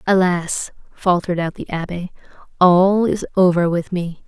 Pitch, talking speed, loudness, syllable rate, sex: 180 Hz, 140 wpm, -18 LUFS, 4.5 syllables/s, female